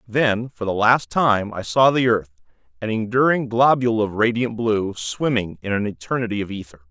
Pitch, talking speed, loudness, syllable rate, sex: 110 Hz, 175 wpm, -20 LUFS, 5.1 syllables/s, male